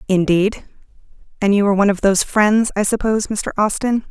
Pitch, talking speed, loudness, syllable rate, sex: 205 Hz, 175 wpm, -17 LUFS, 6.3 syllables/s, female